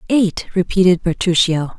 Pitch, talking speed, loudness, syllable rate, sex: 180 Hz, 100 wpm, -16 LUFS, 4.6 syllables/s, female